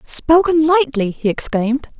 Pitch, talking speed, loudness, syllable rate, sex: 280 Hz, 120 wpm, -15 LUFS, 4.3 syllables/s, female